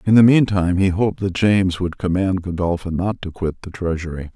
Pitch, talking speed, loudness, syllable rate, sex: 95 Hz, 205 wpm, -19 LUFS, 5.7 syllables/s, male